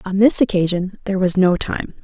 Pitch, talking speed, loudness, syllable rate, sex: 190 Hz, 205 wpm, -17 LUFS, 5.5 syllables/s, female